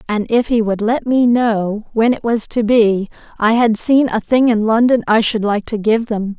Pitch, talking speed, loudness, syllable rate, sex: 225 Hz, 235 wpm, -15 LUFS, 4.5 syllables/s, female